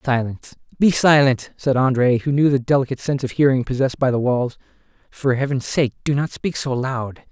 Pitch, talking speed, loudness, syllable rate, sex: 130 Hz, 190 wpm, -19 LUFS, 5.8 syllables/s, male